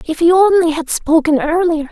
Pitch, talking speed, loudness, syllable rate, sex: 325 Hz, 190 wpm, -13 LUFS, 5.1 syllables/s, female